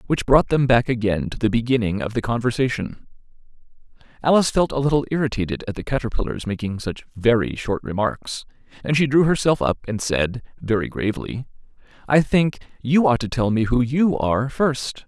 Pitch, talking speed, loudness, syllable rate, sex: 125 Hz, 175 wpm, -21 LUFS, 5.5 syllables/s, male